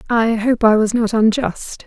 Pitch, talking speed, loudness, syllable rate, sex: 225 Hz, 195 wpm, -16 LUFS, 4.2 syllables/s, female